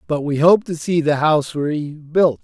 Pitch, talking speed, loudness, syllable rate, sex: 155 Hz, 200 wpm, -18 LUFS, 4.4 syllables/s, male